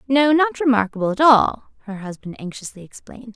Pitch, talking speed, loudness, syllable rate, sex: 235 Hz, 160 wpm, -17 LUFS, 5.7 syllables/s, female